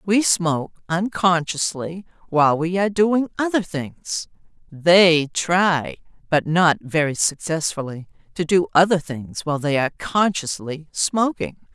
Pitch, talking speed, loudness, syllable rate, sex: 170 Hz, 125 wpm, -20 LUFS, 4.2 syllables/s, female